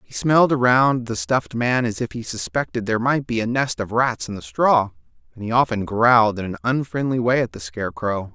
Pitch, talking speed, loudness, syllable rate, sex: 115 Hz, 225 wpm, -20 LUFS, 5.5 syllables/s, male